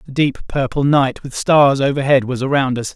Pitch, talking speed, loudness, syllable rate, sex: 135 Hz, 205 wpm, -16 LUFS, 5.0 syllables/s, male